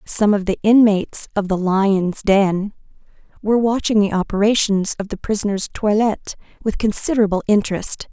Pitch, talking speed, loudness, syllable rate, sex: 205 Hz, 140 wpm, -18 LUFS, 5.1 syllables/s, female